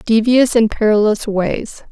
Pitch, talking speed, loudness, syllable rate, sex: 220 Hz, 125 wpm, -15 LUFS, 4.1 syllables/s, female